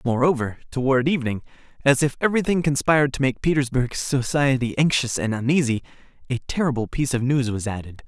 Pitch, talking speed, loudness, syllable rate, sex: 130 Hz, 155 wpm, -22 LUFS, 6.1 syllables/s, male